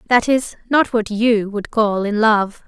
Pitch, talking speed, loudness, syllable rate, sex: 220 Hz, 200 wpm, -17 LUFS, 3.9 syllables/s, female